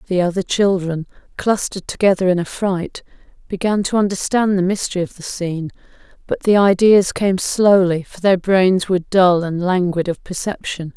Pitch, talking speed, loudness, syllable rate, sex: 185 Hz, 160 wpm, -17 LUFS, 5.1 syllables/s, female